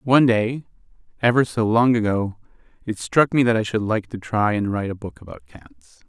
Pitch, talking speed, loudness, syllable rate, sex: 110 Hz, 205 wpm, -20 LUFS, 5.3 syllables/s, male